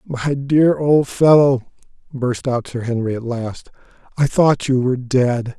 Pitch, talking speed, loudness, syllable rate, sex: 130 Hz, 160 wpm, -17 LUFS, 3.9 syllables/s, male